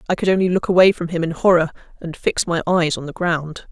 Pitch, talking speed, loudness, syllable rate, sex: 170 Hz, 260 wpm, -18 LUFS, 6.0 syllables/s, female